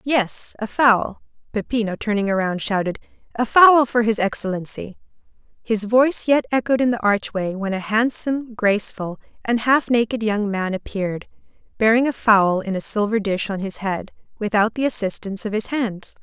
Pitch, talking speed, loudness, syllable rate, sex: 215 Hz, 165 wpm, -20 LUFS, 5.1 syllables/s, female